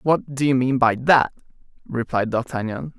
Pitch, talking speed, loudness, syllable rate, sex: 130 Hz, 160 wpm, -21 LUFS, 4.7 syllables/s, male